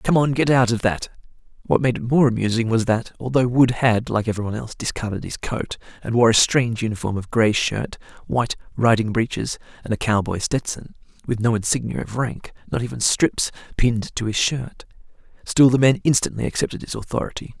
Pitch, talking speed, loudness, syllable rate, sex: 115 Hz, 195 wpm, -21 LUFS, 5.7 syllables/s, male